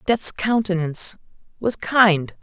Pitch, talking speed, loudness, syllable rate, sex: 195 Hz, 100 wpm, -20 LUFS, 3.8 syllables/s, female